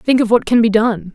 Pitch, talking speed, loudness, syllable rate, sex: 220 Hz, 315 wpm, -14 LUFS, 5.4 syllables/s, female